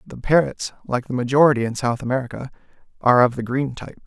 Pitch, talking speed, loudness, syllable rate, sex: 130 Hz, 190 wpm, -20 LUFS, 6.6 syllables/s, male